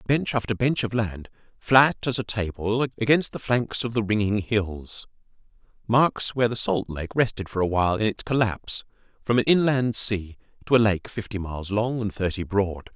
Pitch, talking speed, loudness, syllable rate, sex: 110 Hz, 185 wpm, -24 LUFS, 4.9 syllables/s, male